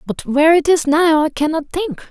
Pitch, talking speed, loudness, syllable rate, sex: 315 Hz, 230 wpm, -15 LUFS, 5.2 syllables/s, female